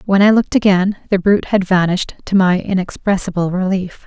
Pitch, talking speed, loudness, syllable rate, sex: 190 Hz, 175 wpm, -15 LUFS, 5.9 syllables/s, female